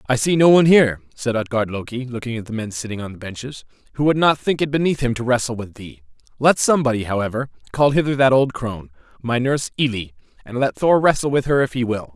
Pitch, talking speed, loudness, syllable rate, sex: 125 Hz, 230 wpm, -19 LUFS, 6.5 syllables/s, male